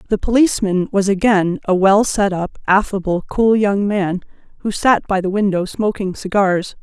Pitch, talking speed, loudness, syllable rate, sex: 200 Hz, 165 wpm, -16 LUFS, 4.8 syllables/s, female